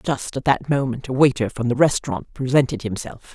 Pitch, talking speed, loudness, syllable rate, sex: 130 Hz, 195 wpm, -21 LUFS, 5.4 syllables/s, female